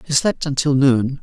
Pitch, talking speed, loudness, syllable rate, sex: 135 Hz, 195 wpm, -17 LUFS, 4.6 syllables/s, male